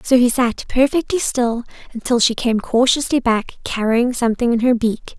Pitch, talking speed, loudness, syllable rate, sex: 240 Hz, 175 wpm, -17 LUFS, 5.2 syllables/s, female